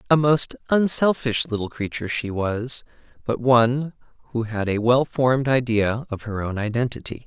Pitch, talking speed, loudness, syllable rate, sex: 120 Hz, 155 wpm, -22 LUFS, 4.9 syllables/s, male